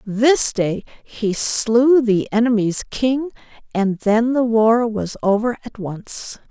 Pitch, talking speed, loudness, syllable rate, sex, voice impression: 225 Hz, 140 wpm, -18 LUFS, 3.3 syllables/s, female, slightly feminine, slightly young, clear, slightly intense, sharp